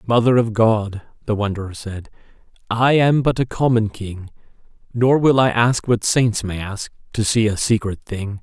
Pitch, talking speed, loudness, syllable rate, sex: 110 Hz, 180 wpm, -18 LUFS, 4.5 syllables/s, male